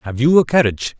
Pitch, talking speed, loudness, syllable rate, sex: 130 Hz, 240 wpm, -15 LUFS, 6.9 syllables/s, male